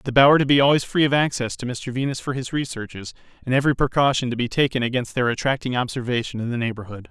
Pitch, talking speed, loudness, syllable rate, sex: 125 Hz, 230 wpm, -21 LUFS, 6.9 syllables/s, male